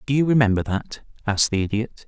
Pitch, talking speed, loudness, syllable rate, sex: 115 Hz, 205 wpm, -21 LUFS, 6.3 syllables/s, male